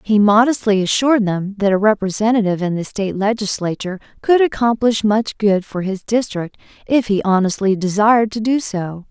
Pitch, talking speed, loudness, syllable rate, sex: 210 Hz, 165 wpm, -17 LUFS, 5.4 syllables/s, female